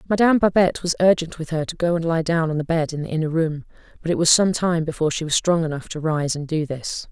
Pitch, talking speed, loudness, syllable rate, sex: 165 Hz, 280 wpm, -21 LUFS, 6.4 syllables/s, female